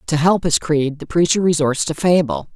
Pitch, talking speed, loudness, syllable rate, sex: 160 Hz, 210 wpm, -17 LUFS, 5.0 syllables/s, female